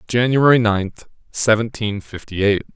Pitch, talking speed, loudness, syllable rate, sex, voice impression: 110 Hz, 110 wpm, -17 LUFS, 4.4 syllables/s, male, masculine, adult-like, tensed, powerful, slightly bright, slightly fluent, slightly halting, slightly intellectual, sincere, calm, friendly, wild, slightly lively, kind, modest